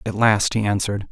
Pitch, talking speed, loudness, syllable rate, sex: 105 Hz, 215 wpm, -20 LUFS, 5.9 syllables/s, male